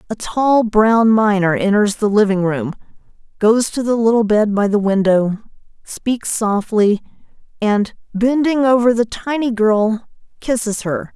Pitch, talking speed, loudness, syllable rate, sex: 220 Hz, 140 wpm, -16 LUFS, 4.1 syllables/s, female